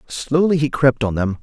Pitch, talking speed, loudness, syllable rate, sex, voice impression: 135 Hz, 210 wpm, -18 LUFS, 4.8 syllables/s, male, very masculine, old, very thick, slightly tensed, slightly weak, bright, slightly dark, hard, very clear, very fluent, cool, slightly intellectual, refreshing, slightly sincere, calm, very mature, slightly friendly, slightly reassuring, unique, slightly elegant, wild, slightly sweet, lively, kind, slightly intense, slightly sharp, slightly light